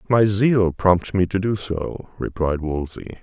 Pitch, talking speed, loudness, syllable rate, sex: 95 Hz, 165 wpm, -21 LUFS, 3.9 syllables/s, male